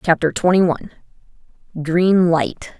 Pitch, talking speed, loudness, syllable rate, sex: 170 Hz, 85 wpm, -17 LUFS, 4.6 syllables/s, female